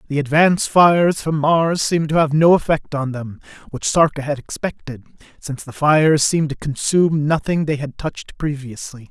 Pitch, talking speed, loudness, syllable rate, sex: 150 Hz, 180 wpm, -17 LUFS, 5.4 syllables/s, male